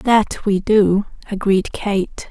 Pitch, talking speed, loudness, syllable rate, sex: 205 Hz, 130 wpm, -18 LUFS, 3.1 syllables/s, female